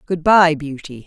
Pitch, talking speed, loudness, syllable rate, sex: 160 Hz, 170 wpm, -15 LUFS, 4.2 syllables/s, female